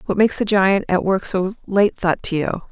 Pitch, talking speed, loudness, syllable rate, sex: 195 Hz, 220 wpm, -19 LUFS, 5.1 syllables/s, female